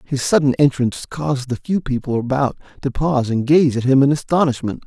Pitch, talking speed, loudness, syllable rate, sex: 135 Hz, 195 wpm, -18 LUFS, 5.8 syllables/s, male